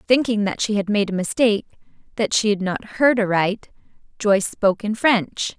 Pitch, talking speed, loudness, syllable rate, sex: 210 Hz, 185 wpm, -20 LUFS, 5.2 syllables/s, female